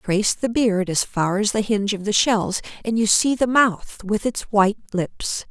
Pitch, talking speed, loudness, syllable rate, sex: 210 Hz, 220 wpm, -20 LUFS, 4.6 syllables/s, female